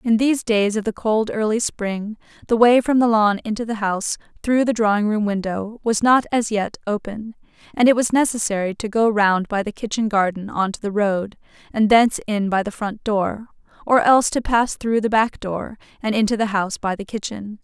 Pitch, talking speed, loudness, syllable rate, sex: 215 Hz, 215 wpm, -20 LUFS, 5.2 syllables/s, female